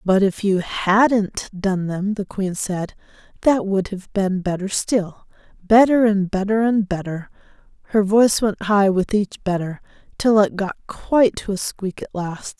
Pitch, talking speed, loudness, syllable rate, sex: 200 Hz, 170 wpm, -20 LUFS, 4.2 syllables/s, female